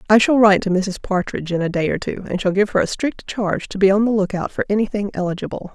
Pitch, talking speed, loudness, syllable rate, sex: 200 Hz, 290 wpm, -19 LUFS, 6.7 syllables/s, female